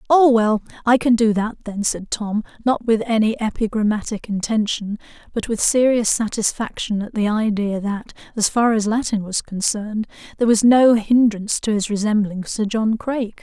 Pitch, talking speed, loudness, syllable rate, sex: 220 Hz, 170 wpm, -19 LUFS, 5.0 syllables/s, female